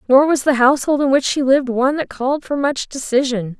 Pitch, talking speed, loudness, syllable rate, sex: 270 Hz, 235 wpm, -17 LUFS, 6.2 syllables/s, female